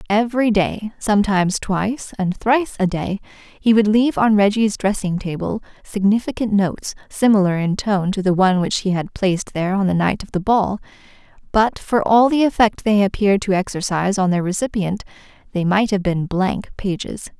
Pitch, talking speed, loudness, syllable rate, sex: 200 Hz, 180 wpm, -18 LUFS, 5.3 syllables/s, female